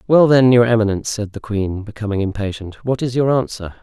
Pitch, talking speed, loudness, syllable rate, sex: 110 Hz, 205 wpm, -17 LUFS, 5.8 syllables/s, male